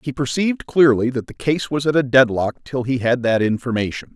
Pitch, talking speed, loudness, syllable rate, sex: 130 Hz, 215 wpm, -19 LUFS, 5.4 syllables/s, male